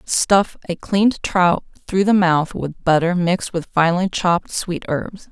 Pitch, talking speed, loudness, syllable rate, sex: 180 Hz, 170 wpm, -18 LUFS, 4.4 syllables/s, female